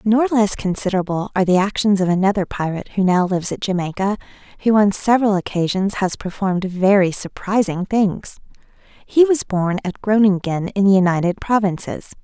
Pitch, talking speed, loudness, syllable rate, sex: 195 Hz, 155 wpm, -18 LUFS, 5.6 syllables/s, female